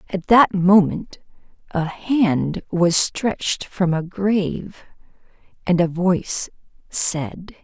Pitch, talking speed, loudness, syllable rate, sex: 185 Hz, 110 wpm, -19 LUFS, 3.2 syllables/s, female